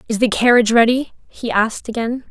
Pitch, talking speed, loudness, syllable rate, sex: 230 Hz, 180 wpm, -16 LUFS, 6.1 syllables/s, female